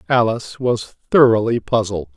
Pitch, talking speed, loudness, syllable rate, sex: 110 Hz, 110 wpm, -18 LUFS, 4.6 syllables/s, male